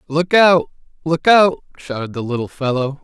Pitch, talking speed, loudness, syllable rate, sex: 150 Hz, 160 wpm, -16 LUFS, 4.8 syllables/s, male